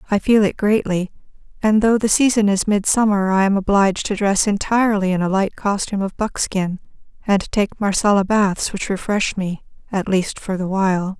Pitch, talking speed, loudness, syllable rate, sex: 200 Hz, 180 wpm, -18 LUFS, 5.2 syllables/s, female